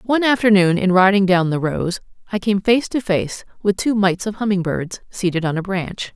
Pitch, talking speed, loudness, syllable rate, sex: 195 Hz, 205 wpm, -18 LUFS, 5.3 syllables/s, female